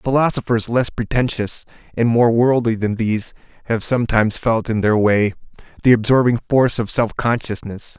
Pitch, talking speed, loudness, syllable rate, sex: 115 Hz, 150 wpm, -18 LUFS, 5.2 syllables/s, male